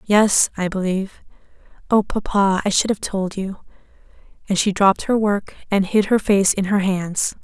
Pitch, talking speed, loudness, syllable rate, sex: 195 Hz, 170 wpm, -19 LUFS, 4.8 syllables/s, female